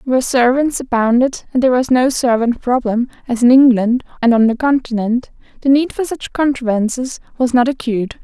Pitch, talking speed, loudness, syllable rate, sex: 250 Hz, 175 wpm, -15 LUFS, 5.4 syllables/s, female